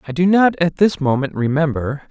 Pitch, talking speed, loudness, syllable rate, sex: 155 Hz, 200 wpm, -17 LUFS, 5.3 syllables/s, male